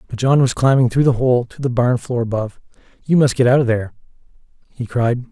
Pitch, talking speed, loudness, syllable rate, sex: 125 Hz, 225 wpm, -17 LUFS, 6.1 syllables/s, male